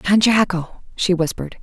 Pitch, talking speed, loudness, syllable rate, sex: 185 Hz, 150 wpm, -18 LUFS, 4.8 syllables/s, female